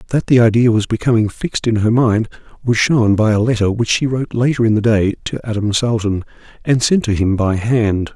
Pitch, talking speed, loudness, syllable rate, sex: 115 Hz, 220 wpm, -15 LUFS, 5.5 syllables/s, male